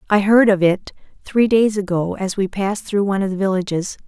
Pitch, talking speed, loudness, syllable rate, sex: 200 Hz, 220 wpm, -18 LUFS, 5.7 syllables/s, female